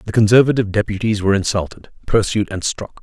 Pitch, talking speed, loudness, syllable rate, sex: 105 Hz, 160 wpm, -17 LUFS, 6.3 syllables/s, male